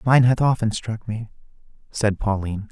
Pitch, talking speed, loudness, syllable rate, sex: 110 Hz, 155 wpm, -22 LUFS, 5.1 syllables/s, male